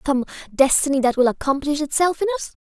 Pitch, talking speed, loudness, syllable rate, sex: 290 Hz, 180 wpm, -19 LUFS, 6.3 syllables/s, female